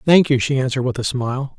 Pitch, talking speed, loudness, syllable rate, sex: 135 Hz, 265 wpm, -19 LUFS, 6.8 syllables/s, male